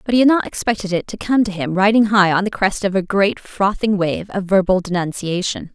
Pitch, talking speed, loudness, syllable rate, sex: 195 Hz, 240 wpm, -18 LUFS, 5.5 syllables/s, female